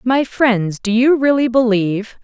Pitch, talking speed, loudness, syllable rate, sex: 235 Hz, 160 wpm, -15 LUFS, 4.3 syllables/s, female